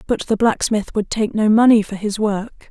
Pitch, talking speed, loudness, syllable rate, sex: 215 Hz, 220 wpm, -17 LUFS, 4.7 syllables/s, female